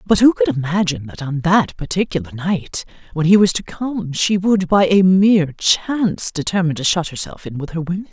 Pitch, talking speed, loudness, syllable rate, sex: 180 Hz, 205 wpm, -17 LUFS, 5.4 syllables/s, female